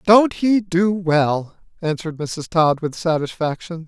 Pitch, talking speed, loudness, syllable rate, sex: 170 Hz, 140 wpm, -19 LUFS, 4.0 syllables/s, male